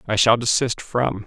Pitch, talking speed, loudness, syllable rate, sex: 115 Hz, 190 wpm, -20 LUFS, 4.4 syllables/s, male